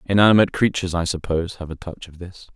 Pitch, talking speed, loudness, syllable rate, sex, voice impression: 90 Hz, 210 wpm, -20 LUFS, 7.2 syllables/s, male, very masculine, very adult-like, slightly old, very thick, slightly tensed, powerful, bright, hard, slightly muffled, fluent, very cool, very intellectual, slightly refreshing, very sincere, very calm, mature, friendly, reassuring, unique, elegant, slightly wild, slightly sweet, lively, kind, modest